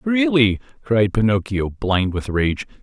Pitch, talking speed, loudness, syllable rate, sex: 115 Hz, 125 wpm, -19 LUFS, 3.8 syllables/s, male